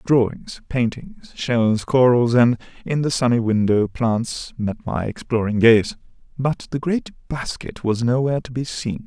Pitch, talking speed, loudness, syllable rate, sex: 125 Hz, 150 wpm, -20 LUFS, 4.1 syllables/s, male